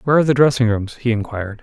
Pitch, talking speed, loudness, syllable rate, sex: 120 Hz, 260 wpm, -17 LUFS, 7.8 syllables/s, male